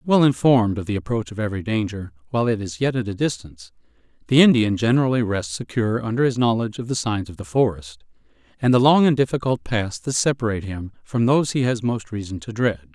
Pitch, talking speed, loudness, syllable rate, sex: 110 Hz, 215 wpm, -21 LUFS, 6.3 syllables/s, male